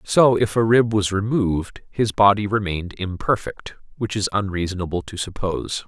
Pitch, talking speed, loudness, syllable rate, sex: 100 Hz, 155 wpm, -21 LUFS, 5.1 syllables/s, male